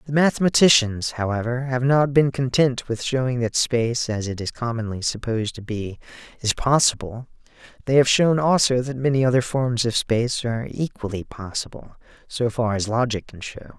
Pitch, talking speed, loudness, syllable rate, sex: 120 Hz, 170 wpm, -21 LUFS, 5.2 syllables/s, male